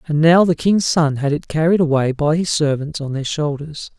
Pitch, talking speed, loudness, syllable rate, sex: 155 Hz, 225 wpm, -17 LUFS, 5.0 syllables/s, male